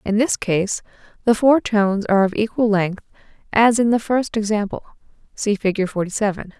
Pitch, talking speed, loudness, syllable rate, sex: 210 Hz, 175 wpm, -19 LUFS, 4.6 syllables/s, female